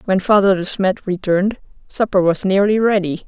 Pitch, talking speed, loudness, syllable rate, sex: 195 Hz, 165 wpm, -16 LUFS, 5.3 syllables/s, female